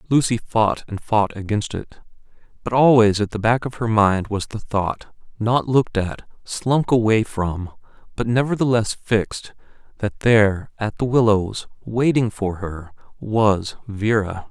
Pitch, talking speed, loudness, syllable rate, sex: 110 Hz, 150 wpm, -20 LUFS, 4.1 syllables/s, male